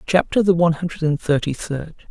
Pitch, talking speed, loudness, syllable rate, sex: 165 Hz, 200 wpm, -20 LUFS, 5.9 syllables/s, male